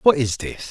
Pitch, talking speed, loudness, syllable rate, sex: 135 Hz, 255 wpm, -22 LUFS, 4.5 syllables/s, male